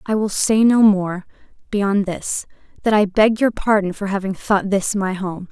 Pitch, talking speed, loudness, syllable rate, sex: 200 Hz, 185 wpm, -18 LUFS, 4.4 syllables/s, female